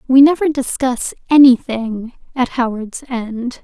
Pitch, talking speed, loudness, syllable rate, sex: 250 Hz, 115 wpm, -15 LUFS, 3.9 syllables/s, female